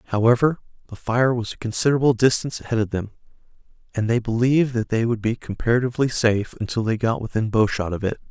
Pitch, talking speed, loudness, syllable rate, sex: 115 Hz, 195 wpm, -21 LUFS, 6.8 syllables/s, male